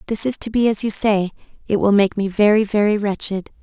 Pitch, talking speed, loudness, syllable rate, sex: 205 Hz, 250 wpm, -18 LUFS, 5.9 syllables/s, female